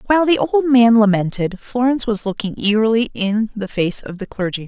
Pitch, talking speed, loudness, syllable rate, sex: 220 Hz, 195 wpm, -17 LUFS, 5.8 syllables/s, female